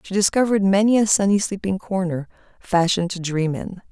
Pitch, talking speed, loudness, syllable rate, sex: 190 Hz, 170 wpm, -20 LUFS, 5.9 syllables/s, female